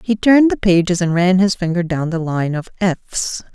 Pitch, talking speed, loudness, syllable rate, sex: 180 Hz, 220 wpm, -16 LUFS, 4.9 syllables/s, female